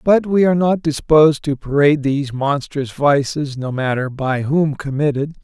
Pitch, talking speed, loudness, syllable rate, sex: 145 Hz, 165 wpm, -17 LUFS, 5.0 syllables/s, male